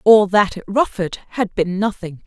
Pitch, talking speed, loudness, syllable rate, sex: 200 Hz, 185 wpm, -18 LUFS, 4.6 syllables/s, female